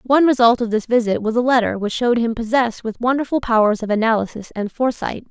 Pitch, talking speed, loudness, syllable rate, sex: 230 Hz, 215 wpm, -18 LUFS, 6.6 syllables/s, female